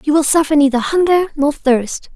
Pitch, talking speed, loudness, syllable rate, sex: 295 Hz, 195 wpm, -14 LUFS, 5.1 syllables/s, female